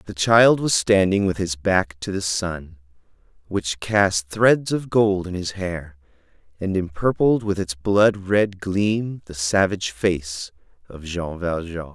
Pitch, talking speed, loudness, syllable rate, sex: 95 Hz, 155 wpm, -21 LUFS, 3.6 syllables/s, male